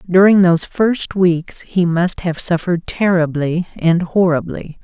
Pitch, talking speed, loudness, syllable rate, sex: 175 Hz, 135 wpm, -16 LUFS, 4.2 syllables/s, female